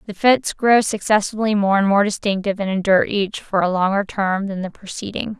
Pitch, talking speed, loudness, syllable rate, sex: 200 Hz, 200 wpm, -19 LUFS, 5.7 syllables/s, female